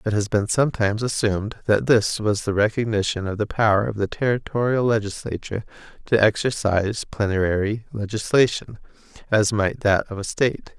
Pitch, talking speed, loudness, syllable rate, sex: 105 Hz, 150 wpm, -22 LUFS, 5.4 syllables/s, male